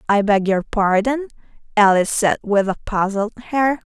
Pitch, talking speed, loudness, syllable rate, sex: 215 Hz, 155 wpm, -18 LUFS, 5.0 syllables/s, female